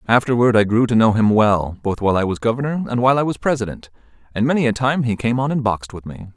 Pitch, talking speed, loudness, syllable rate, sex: 115 Hz, 265 wpm, -18 LUFS, 6.8 syllables/s, male